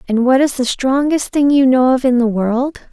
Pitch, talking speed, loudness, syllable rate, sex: 260 Hz, 245 wpm, -14 LUFS, 4.7 syllables/s, female